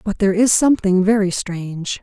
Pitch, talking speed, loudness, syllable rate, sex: 200 Hz, 180 wpm, -17 LUFS, 5.7 syllables/s, female